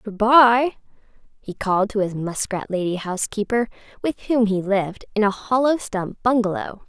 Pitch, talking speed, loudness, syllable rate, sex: 215 Hz, 155 wpm, -21 LUFS, 4.9 syllables/s, female